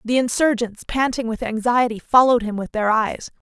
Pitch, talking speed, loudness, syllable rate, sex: 235 Hz, 170 wpm, -19 LUFS, 5.3 syllables/s, female